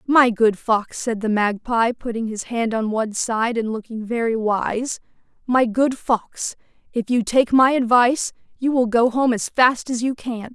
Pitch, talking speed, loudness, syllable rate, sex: 235 Hz, 180 wpm, -20 LUFS, 4.5 syllables/s, female